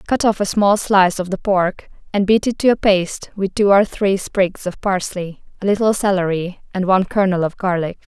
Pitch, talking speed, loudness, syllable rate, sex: 190 Hz, 215 wpm, -18 LUFS, 5.2 syllables/s, female